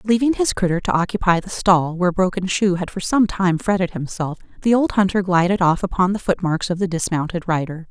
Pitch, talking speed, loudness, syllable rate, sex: 185 Hz, 210 wpm, -19 LUFS, 5.7 syllables/s, female